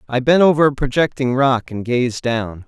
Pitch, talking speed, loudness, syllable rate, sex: 130 Hz, 200 wpm, -17 LUFS, 4.8 syllables/s, male